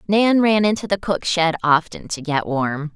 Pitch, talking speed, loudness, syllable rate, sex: 175 Hz, 205 wpm, -19 LUFS, 4.4 syllables/s, female